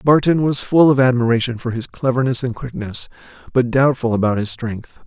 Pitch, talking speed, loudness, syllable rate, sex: 125 Hz, 180 wpm, -18 LUFS, 5.3 syllables/s, male